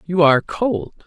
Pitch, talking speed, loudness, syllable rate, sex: 170 Hz, 170 wpm, -18 LUFS, 4.6 syllables/s, female